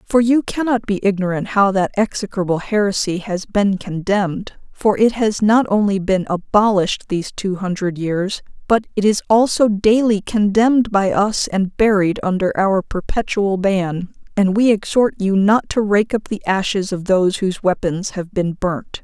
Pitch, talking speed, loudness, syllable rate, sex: 200 Hz, 170 wpm, -17 LUFS, 4.6 syllables/s, female